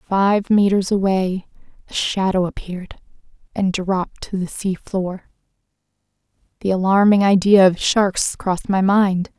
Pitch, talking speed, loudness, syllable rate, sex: 190 Hz, 120 wpm, -18 LUFS, 4.3 syllables/s, female